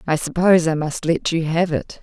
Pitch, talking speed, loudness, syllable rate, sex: 165 Hz, 235 wpm, -19 LUFS, 5.3 syllables/s, female